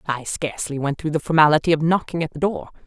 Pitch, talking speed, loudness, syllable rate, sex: 150 Hz, 230 wpm, -20 LUFS, 6.6 syllables/s, female